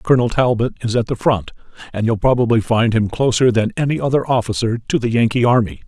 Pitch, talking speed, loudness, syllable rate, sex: 115 Hz, 205 wpm, -17 LUFS, 6.2 syllables/s, male